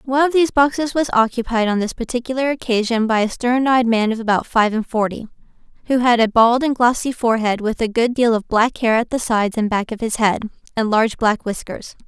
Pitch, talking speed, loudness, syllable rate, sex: 235 Hz, 230 wpm, -18 LUFS, 5.8 syllables/s, female